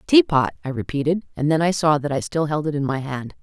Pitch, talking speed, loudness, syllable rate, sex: 150 Hz, 265 wpm, -21 LUFS, 6.0 syllables/s, female